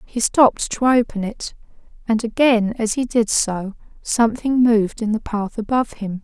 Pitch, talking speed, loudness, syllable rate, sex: 225 Hz, 175 wpm, -19 LUFS, 4.9 syllables/s, female